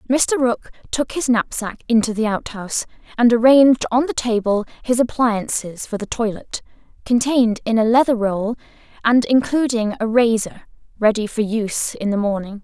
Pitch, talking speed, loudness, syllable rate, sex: 230 Hz, 145 wpm, -18 LUFS, 5.0 syllables/s, female